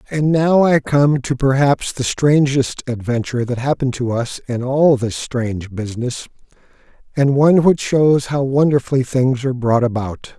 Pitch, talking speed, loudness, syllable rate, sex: 135 Hz, 160 wpm, -17 LUFS, 4.8 syllables/s, male